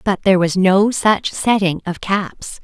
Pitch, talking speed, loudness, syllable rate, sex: 195 Hz, 180 wpm, -16 LUFS, 4.0 syllables/s, female